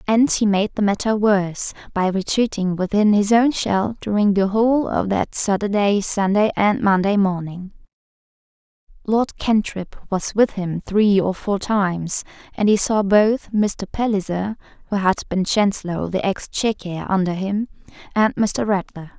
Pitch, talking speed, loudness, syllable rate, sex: 200 Hz, 155 wpm, -19 LUFS, 4.5 syllables/s, female